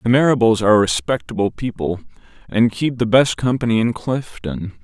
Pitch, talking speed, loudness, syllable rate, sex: 115 Hz, 150 wpm, -18 LUFS, 5.2 syllables/s, male